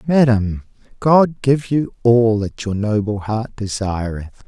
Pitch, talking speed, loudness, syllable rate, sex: 115 Hz, 135 wpm, -18 LUFS, 3.8 syllables/s, male